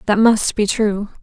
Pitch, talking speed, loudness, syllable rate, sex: 210 Hz, 195 wpm, -16 LUFS, 4.1 syllables/s, female